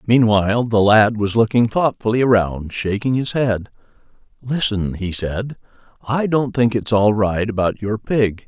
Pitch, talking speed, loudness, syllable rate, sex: 110 Hz, 155 wpm, -18 LUFS, 4.3 syllables/s, male